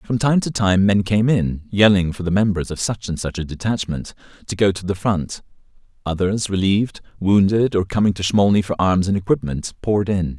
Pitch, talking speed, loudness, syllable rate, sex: 100 Hz, 200 wpm, -19 LUFS, 5.3 syllables/s, male